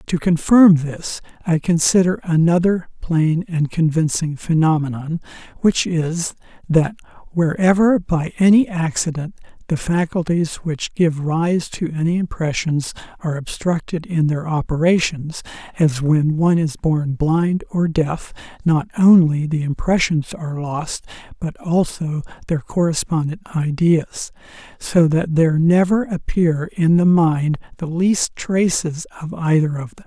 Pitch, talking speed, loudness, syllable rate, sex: 165 Hz, 130 wpm, -18 LUFS, 4.2 syllables/s, male